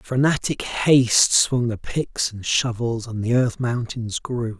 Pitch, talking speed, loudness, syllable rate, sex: 120 Hz, 155 wpm, -21 LUFS, 3.9 syllables/s, male